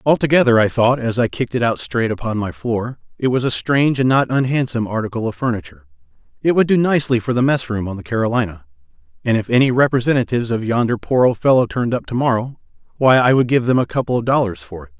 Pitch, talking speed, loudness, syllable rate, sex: 125 Hz, 220 wpm, -17 LUFS, 6.7 syllables/s, male